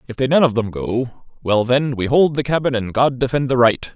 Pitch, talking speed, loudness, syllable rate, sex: 125 Hz, 260 wpm, -17 LUFS, 5.1 syllables/s, male